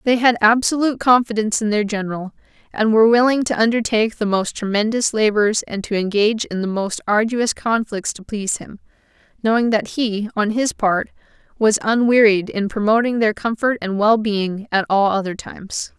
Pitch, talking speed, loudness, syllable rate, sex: 220 Hz, 175 wpm, -18 LUFS, 5.3 syllables/s, female